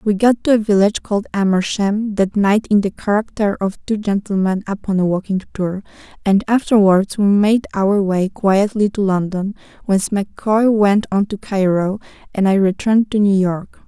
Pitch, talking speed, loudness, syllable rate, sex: 200 Hz, 175 wpm, -17 LUFS, 4.9 syllables/s, female